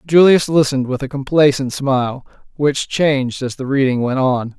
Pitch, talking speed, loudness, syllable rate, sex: 135 Hz, 170 wpm, -16 LUFS, 5.1 syllables/s, male